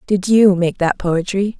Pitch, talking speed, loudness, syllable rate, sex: 190 Hz, 190 wpm, -15 LUFS, 4.1 syllables/s, female